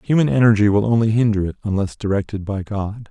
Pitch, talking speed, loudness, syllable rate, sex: 105 Hz, 195 wpm, -18 LUFS, 6.1 syllables/s, male